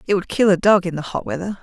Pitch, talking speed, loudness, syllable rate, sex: 190 Hz, 330 wpm, -18 LUFS, 6.9 syllables/s, female